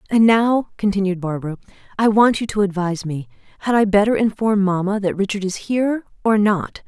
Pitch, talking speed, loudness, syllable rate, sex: 200 Hz, 185 wpm, -19 LUFS, 5.7 syllables/s, female